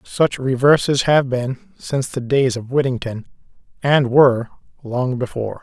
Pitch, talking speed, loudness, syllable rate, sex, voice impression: 130 Hz, 140 wpm, -18 LUFS, 4.7 syllables/s, male, masculine, adult-like, slightly tensed, slightly weak, slightly muffled, cool, intellectual, calm, mature, reassuring, wild, slightly lively, slightly modest